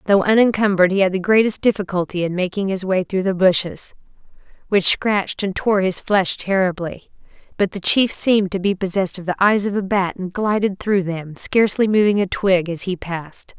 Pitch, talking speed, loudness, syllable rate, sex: 190 Hz, 200 wpm, -18 LUFS, 5.4 syllables/s, female